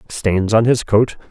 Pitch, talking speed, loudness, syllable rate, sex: 105 Hz, 185 wpm, -16 LUFS, 3.9 syllables/s, male